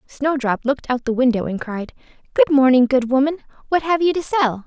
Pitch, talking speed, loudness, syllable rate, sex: 265 Hz, 220 wpm, -18 LUFS, 5.8 syllables/s, female